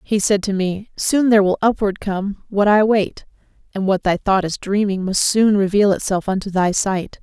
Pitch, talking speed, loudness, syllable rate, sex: 200 Hz, 210 wpm, -18 LUFS, 5.0 syllables/s, female